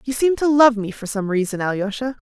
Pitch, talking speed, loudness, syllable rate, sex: 230 Hz, 235 wpm, -19 LUFS, 5.7 syllables/s, female